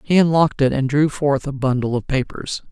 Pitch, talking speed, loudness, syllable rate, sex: 140 Hz, 220 wpm, -19 LUFS, 5.5 syllables/s, female